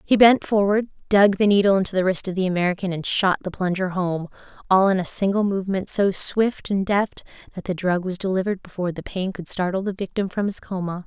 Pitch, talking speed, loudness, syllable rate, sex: 190 Hz, 220 wpm, -21 LUFS, 5.9 syllables/s, female